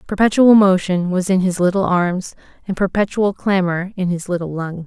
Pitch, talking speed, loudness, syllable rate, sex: 185 Hz, 175 wpm, -17 LUFS, 5.0 syllables/s, female